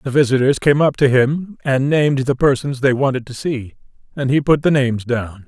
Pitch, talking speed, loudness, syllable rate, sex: 135 Hz, 220 wpm, -17 LUFS, 5.3 syllables/s, male